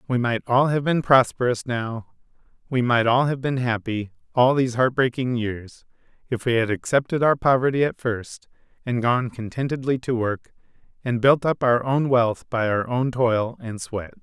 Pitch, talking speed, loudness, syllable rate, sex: 125 Hz, 180 wpm, -22 LUFS, 4.6 syllables/s, male